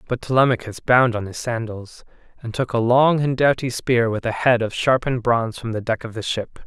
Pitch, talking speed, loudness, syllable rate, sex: 120 Hz, 225 wpm, -20 LUFS, 5.4 syllables/s, male